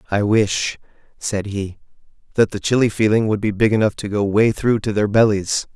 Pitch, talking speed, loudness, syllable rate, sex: 105 Hz, 200 wpm, -18 LUFS, 5.1 syllables/s, male